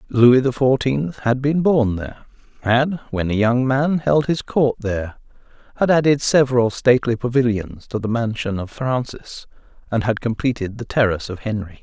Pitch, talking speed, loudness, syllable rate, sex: 120 Hz, 165 wpm, -19 LUFS, 5.1 syllables/s, male